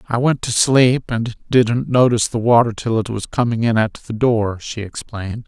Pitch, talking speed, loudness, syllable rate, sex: 115 Hz, 210 wpm, -17 LUFS, 4.9 syllables/s, male